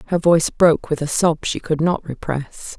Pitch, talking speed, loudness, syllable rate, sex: 160 Hz, 215 wpm, -19 LUFS, 5.2 syllables/s, female